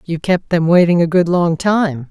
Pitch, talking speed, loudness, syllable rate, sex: 170 Hz, 230 wpm, -14 LUFS, 4.5 syllables/s, female